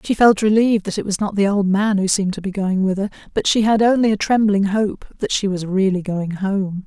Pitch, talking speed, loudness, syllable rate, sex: 200 Hz, 260 wpm, -18 LUFS, 5.5 syllables/s, female